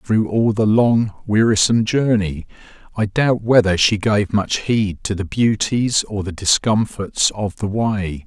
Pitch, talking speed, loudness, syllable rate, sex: 105 Hz, 160 wpm, -18 LUFS, 4.0 syllables/s, male